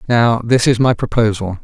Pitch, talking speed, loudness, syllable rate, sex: 115 Hz, 185 wpm, -14 LUFS, 4.9 syllables/s, male